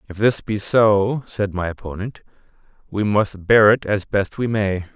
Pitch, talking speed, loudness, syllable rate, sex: 105 Hz, 180 wpm, -19 LUFS, 4.3 syllables/s, male